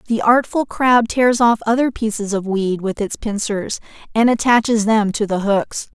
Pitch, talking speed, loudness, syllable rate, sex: 220 Hz, 180 wpm, -17 LUFS, 4.5 syllables/s, female